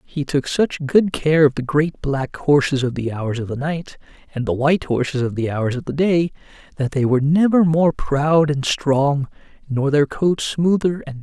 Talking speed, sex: 220 wpm, male